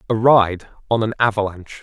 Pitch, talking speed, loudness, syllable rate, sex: 105 Hz, 165 wpm, -18 LUFS, 5.7 syllables/s, male